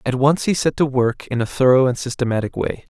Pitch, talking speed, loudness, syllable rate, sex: 130 Hz, 245 wpm, -19 LUFS, 5.8 syllables/s, male